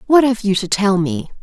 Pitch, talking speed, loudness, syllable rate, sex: 200 Hz, 250 wpm, -16 LUFS, 5.0 syllables/s, female